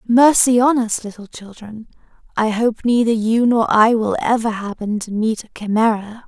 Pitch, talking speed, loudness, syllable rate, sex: 225 Hz, 170 wpm, -17 LUFS, 4.7 syllables/s, female